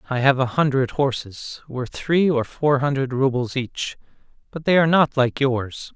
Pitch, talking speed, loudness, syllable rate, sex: 135 Hz, 180 wpm, -21 LUFS, 4.5 syllables/s, male